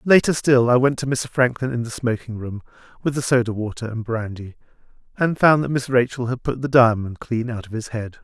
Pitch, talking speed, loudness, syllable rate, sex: 120 Hz, 225 wpm, -20 LUFS, 5.5 syllables/s, male